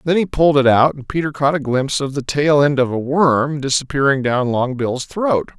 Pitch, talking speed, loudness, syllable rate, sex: 140 Hz, 225 wpm, -17 LUFS, 5.2 syllables/s, male